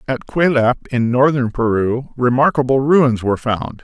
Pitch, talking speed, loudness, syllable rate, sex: 130 Hz, 140 wpm, -16 LUFS, 4.9 syllables/s, male